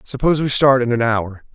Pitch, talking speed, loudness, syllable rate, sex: 125 Hz, 235 wpm, -16 LUFS, 5.8 syllables/s, male